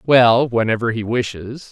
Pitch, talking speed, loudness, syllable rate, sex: 120 Hz, 140 wpm, -17 LUFS, 4.5 syllables/s, male